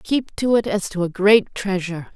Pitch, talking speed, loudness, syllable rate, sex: 195 Hz, 225 wpm, -20 LUFS, 4.9 syllables/s, female